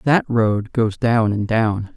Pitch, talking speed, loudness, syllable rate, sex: 110 Hz, 185 wpm, -19 LUFS, 3.3 syllables/s, male